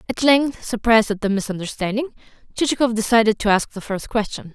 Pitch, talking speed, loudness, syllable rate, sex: 225 Hz, 170 wpm, -20 LUFS, 6.3 syllables/s, female